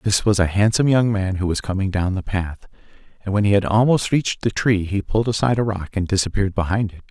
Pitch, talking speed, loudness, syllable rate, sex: 100 Hz, 245 wpm, -20 LUFS, 6.4 syllables/s, male